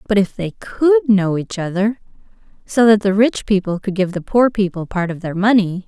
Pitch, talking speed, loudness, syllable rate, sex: 200 Hz, 215 wpm, -17 LUFS, 5.0 syllables/s, female